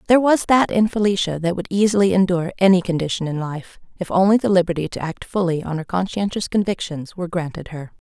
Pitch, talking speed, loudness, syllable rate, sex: 185 Hz, 200 wpm, -19 LUFS, 6.3 syllables/s, female